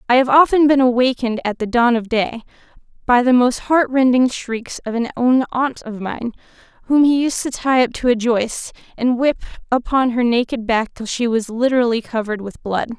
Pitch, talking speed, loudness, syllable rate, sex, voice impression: 245 Hz, 205 wpm, -17 LUFS, 5.2 syllables/s, female, very feminine, young, slightly adult-like, very thin, very tensed, slightly powerful, very bright, slightly hard, very clear, very fluent, slightly raspy, cute, slightly cool, intellectual, very refreshing, sincere, calm, friendly, reassuring, very unique, elegant, slightly wild, very sweet, lively, kind, slightly intense, slightly sharp, light